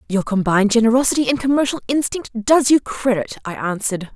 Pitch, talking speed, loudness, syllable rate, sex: 235 Hz, 160 wpm, -18 LUFS, 6.1 syllables/s, female